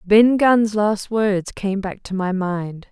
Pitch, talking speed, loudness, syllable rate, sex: 205 Hz, 185 wpm, -19 LUFS, 3.3 syllables/s, female